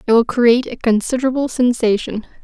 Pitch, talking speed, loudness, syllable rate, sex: 240 Hz, 150 wpm, -16 LUFS, 6.1 syllables/s, female